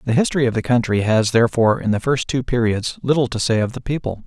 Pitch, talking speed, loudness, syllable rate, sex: 120 Hz, 255 wpm, -19 LUFS, 6.6 syllables/s, male